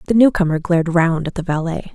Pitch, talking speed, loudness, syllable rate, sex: 175 Hz, 215 wpm, -17 LUFS, 6.2 syllables/s, female